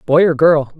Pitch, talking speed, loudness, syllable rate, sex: 155 Hz, 230 wpm, -13 LUFS, 4.8 syllables/s, male